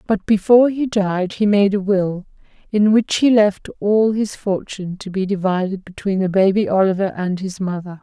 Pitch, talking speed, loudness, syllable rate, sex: 200 Hz, 185 wpm, -18 LUFS, 4.9 syllables/s, female